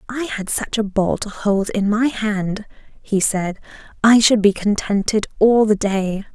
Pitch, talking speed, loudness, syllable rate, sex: 210 Hz, 190 wpm, -18 LUFS, 4.1 syllables/s, female